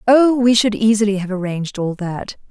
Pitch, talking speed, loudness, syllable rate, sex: 210 Hz, 190 wpm, -17 LUFS, 5.3 syllables/s, female